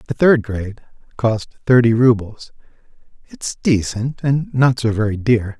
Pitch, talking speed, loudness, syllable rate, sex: 120 Hz, 140 wpm, -17 LUFS, 4.4 syllables/s, male